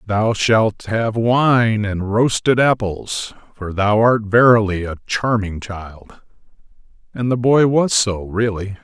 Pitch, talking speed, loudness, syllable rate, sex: 110 Hz, 135 wpm, -17 LUFS, 3.5 syllables/s, male